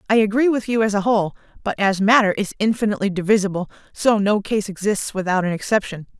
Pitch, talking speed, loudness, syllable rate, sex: 205 Hz, 195 wpm, -19 LUFS, 6.5 syllables/s, female